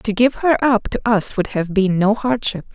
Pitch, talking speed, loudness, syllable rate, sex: 220 Hz, 240 wpm, -18 LUFS, 4.5 syllables/s, female